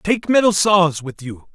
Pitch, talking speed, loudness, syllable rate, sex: 180 Hz, 195 wpm, -15 LUFS, 4.1 syllables/s, male